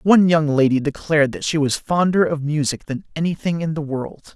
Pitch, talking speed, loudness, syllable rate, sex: 155 Hz, 205 wpm, -19 LUFS, 5.4 syllables/s, male